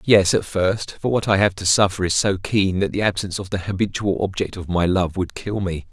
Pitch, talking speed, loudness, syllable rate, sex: 95 Hz, 255 wpm, -20 LUFS, 5.3 syllables/s, male